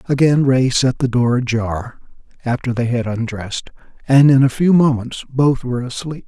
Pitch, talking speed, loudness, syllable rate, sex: 125 Hz, 170 wpm, -16 LUFS, 5.0 syllables/s, male